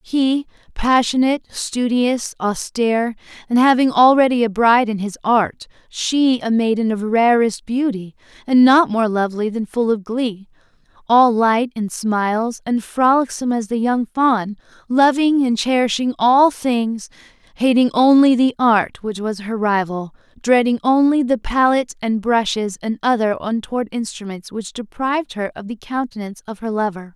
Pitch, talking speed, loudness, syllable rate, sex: 235 Hz, 150 wpm, -17 LUFS, 4.6 syllables/s, female